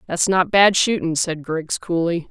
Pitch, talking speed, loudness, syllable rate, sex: 175 Hz, 180 wpm, -18 LUFS, 4.2 syllables/s, female